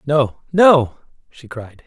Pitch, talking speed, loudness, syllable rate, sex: 140 Hz, 130 wpm, -15 LUFS, 3.0 syllables/s, male